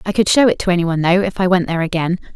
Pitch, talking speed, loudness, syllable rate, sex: 180 Hz, 330 wpm, -16 LUFS, 8.1 syllables/s, female